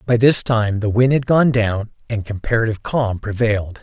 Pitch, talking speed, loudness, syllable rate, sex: 115 Hz, 190 wpm, -18 LUFS, 5.1 syllables/s, male